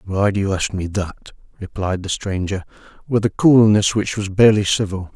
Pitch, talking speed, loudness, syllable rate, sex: 100 Hz, 185 wpm, -18 LUFS, 5.1 syllables/s, male